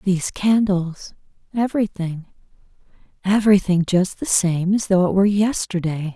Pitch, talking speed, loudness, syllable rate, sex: 190 Hz, 95 wpm, -19 LUFS, 5.0 syllables/s, female